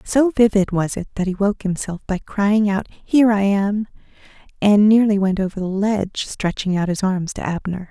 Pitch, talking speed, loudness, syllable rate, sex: 200 Hz, 195 wpm, -19 LUFS, 5.0 syllables/s, female